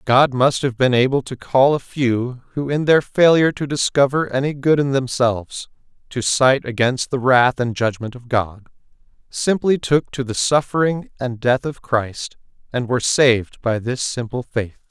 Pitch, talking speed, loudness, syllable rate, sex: 130 Hz, 175 wpm, -18 LUFS, 4.6 syllables/s, male